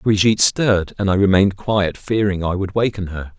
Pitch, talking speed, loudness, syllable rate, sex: 100 Hz, 195 wpm, -18 LUFS, 5.5 syllables/s, male